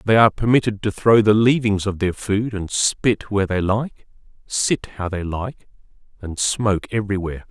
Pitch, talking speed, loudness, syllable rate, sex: 105 Hz, 175 wpm, -19 LUFS, 5.0 syllables/s, male